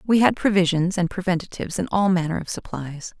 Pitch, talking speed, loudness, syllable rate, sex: 180 Hz, 190 wpm, -22 LUFS, 5.6 syllables/s, female